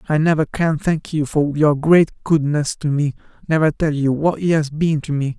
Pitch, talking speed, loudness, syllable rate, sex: 150 Hz, 225 wpm, -18 LUFS, 4.7 syllables/s, male